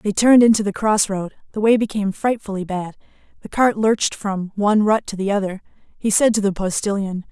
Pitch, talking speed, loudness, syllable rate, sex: 205 Hz, 205 wpm, -19 LUFS, 5.7 syllables/s, female